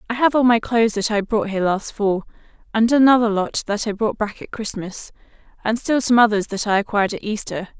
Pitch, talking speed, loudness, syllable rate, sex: 220 Hz, 225 wpm, -19 LUFS, 5.8 syllables/s, female